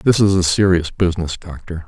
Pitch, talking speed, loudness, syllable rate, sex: 90 Hz, 190 wpm, -16 LUFS, 5.7 syllables/s, male